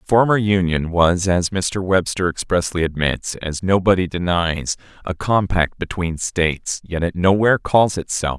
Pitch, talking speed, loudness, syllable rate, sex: 90 Hz, 130 wpm, -19 LUFS, 4.5 syllables/s, male